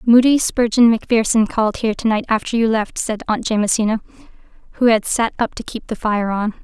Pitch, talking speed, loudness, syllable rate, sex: 225 Hz, 190 wpm, -17 LUFS, 5.8 syllables/s, female